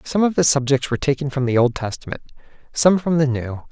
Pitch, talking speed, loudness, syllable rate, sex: 140 Hz, 225 wpm, -19 LUFS, 6.1 syllables/s, male